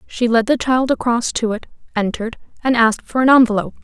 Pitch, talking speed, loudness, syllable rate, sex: 235 Hz, 205 wpm, -17 LUFS, 6.4 syllables/s, female